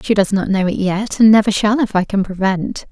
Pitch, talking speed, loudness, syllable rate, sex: 200 Hz, 270 wpm, -15 LUFS, 5.4 syllables/s, female